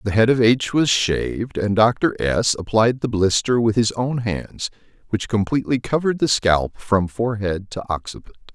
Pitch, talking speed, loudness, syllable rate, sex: 110 Hz, 175 wpm, -20 LUFS, 4.8 syllables/s, male